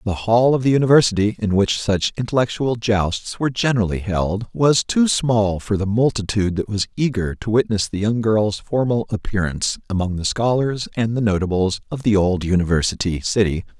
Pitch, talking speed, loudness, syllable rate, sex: 105 Hz, 175 wpm, -19 LUFS, 5.3 syllables/s, male